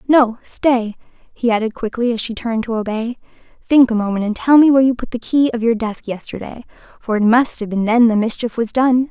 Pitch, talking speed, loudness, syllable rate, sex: 230 Hz, 230 wpm, -16 LUFS, 5.7 syllables/s, female